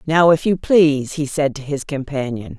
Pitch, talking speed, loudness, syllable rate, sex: 145 Hz, 210 wpm, -18 LUFS, 4.9 syllables/s, female